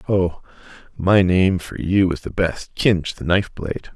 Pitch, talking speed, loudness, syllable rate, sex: 90 Hz, 180 wpm, -20 LUFS, 4.6 syllables/s, male